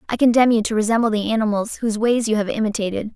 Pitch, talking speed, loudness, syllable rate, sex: 220 Hz, 230 wpm, -19 LUFS, 7.1 syllables/s, female